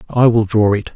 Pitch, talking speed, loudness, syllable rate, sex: 110 Hz, 250 wpm, -14 LUFS, 5.2 syllables/s, male